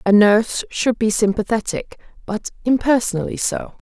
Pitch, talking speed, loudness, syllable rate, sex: 220 Hz, 125 wpm, -19 LUFS, 5.0 syllables/s, female